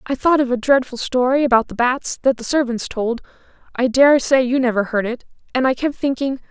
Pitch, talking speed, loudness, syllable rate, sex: 255 Hz, 210 wpm, -18 LUFS, 5.5 syllables/s, female